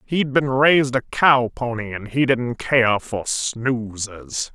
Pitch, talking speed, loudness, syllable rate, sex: 125 Hz, 160 wpm, -20 LUFS, 3.4 syllables/s, male